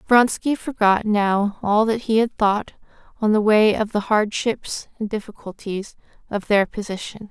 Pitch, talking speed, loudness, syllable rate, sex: 215 Hz, 155 wpm, -20 LUFS, 4.3 syllables/s, female